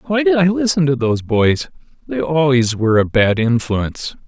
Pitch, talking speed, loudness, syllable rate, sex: 140 Hz, 180 wpm, -16 LUFS, 5.2 syllables/s, male